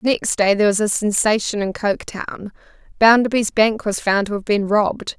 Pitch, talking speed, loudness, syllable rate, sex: 210 Hz, 185 wpm, -18 LUFS, 5.2 syllables/s, female